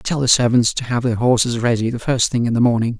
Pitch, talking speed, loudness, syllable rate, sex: 120 Hz, 280 wpm, -17 LUFS, 6.1 syllables/s, male